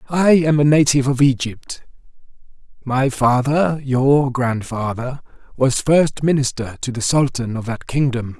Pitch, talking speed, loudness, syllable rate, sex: 135 Hz, 135 wpm, -17 LUFS, 4.2 syllables/s, male